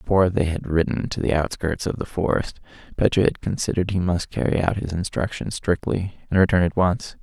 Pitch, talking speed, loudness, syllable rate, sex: 90 Hz, 200 wpm, -22 LUFS, 5.7 syllables/s, male